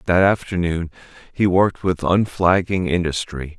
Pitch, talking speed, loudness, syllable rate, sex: 90 Hz, 115 wpm, -19 LUFS, 4.7 syllables/s, male